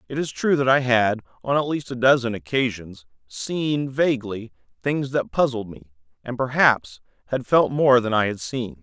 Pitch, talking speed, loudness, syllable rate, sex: 120 Hz, 185 wpm, -22 LUFS, 4.6 syllables/s, male